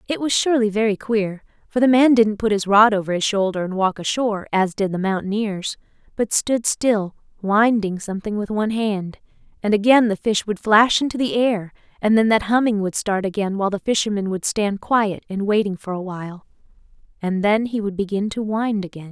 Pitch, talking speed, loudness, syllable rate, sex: 205 Hz, 200 wpm, -20 LUFS, 5.4 syllables/s, female